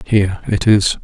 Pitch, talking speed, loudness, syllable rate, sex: 100 Hz, 175 wpm, -15 LUFS, 4.6 syllables/s, male